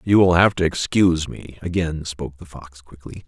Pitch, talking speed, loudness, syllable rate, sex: 85 Hz, 200 wpm, -20 LUFS, 5.1 syllables/s, male